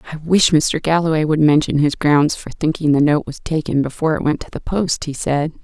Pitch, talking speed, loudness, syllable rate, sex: 155 Hz, 235 wpm, -17 LUFS, 5.5 syllables/s, female